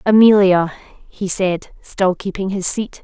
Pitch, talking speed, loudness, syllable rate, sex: 190 Hz, 140 wpm, -16 LUFS, 3.7 syllables/s, female